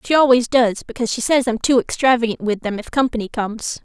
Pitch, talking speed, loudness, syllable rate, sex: 235 Hz, 220 wpm, -18 LUFS, 6.2 syllables/s, female